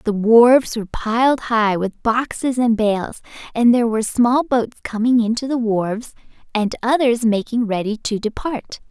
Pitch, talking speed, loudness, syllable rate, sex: 230 Hz, 170 wpm, -18 LUFS, 4.7 syllables/s, female